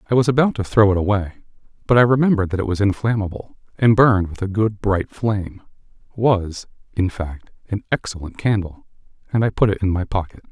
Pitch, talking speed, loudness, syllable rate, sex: 100 Hz, 185 wpm, -19 LUFS, 5.9 syllables/s, male